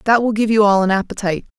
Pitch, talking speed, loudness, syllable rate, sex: 210 Hz, 265 wpm, -16 LUFS, 7.5 syllables/s, female